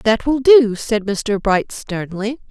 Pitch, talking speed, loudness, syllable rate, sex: 225 Hz, 170 wpm, -17 LUFS, 3.5 syllables/s, female